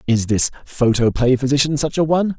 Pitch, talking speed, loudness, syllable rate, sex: 135 Hz, 175 wpm, -17 LUFS, 5.7 syllables/s, male